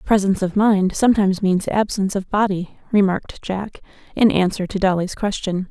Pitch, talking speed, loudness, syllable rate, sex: 195 Hz, 160 wpm, -19 LUFS, 5.5 syllables/s, female